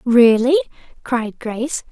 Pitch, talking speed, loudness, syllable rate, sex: 240 Hz, 95 wpm, -17 LUFS, 3.8 syllables/s, female